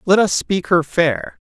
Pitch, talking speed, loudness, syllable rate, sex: 155 Hz, 205 wpm, -17 LUFS, 3.9 syllables/s, male